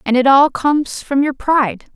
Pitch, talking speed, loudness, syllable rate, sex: 270 Hz, 215 wpm, -15 LUFS, 5.1 syllables/s, female